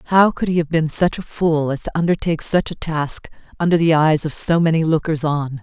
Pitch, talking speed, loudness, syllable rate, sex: 160 Hz, 235 wpm, -18 LUFS, 5.5 syllables/s, female